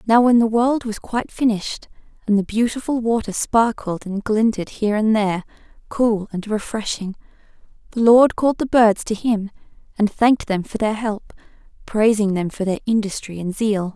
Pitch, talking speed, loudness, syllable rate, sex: 215 Hz, 170 wpm, -19 LUFS, 5.1 syllables/s, female